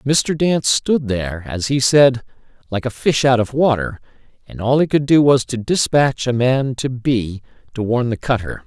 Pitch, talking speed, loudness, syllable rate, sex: 125 Hz, 200 wpm, -17 LUFS, 4.6 syllables/s, male